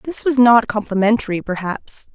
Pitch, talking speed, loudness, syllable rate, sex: 225 Hz, 140 wpm, -16 LUFS, 5.0 syllables/s, female